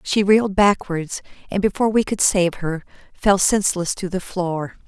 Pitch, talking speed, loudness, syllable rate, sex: 190 Hz, 170 wpm, -19 LUFS, 4.8 syllables/s, female